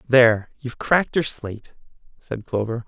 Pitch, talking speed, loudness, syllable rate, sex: 125 Hz, 145 wpm, -21 LUFS, 5.4 syllables/s, male